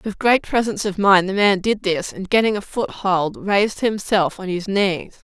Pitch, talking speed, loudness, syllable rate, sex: 195 Hz, 205 wpm, -19 LUFS, 4.7 syllables/s, female